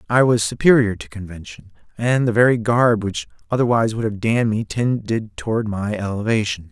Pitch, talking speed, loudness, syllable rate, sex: 110 Hz, 170 wpm, -19 LUFS, 5.5 syllables/s, male